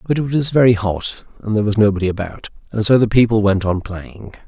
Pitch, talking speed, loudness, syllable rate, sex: 105 Hz, 230 wpm, -17 LUFS, 5.8 syllables/s, male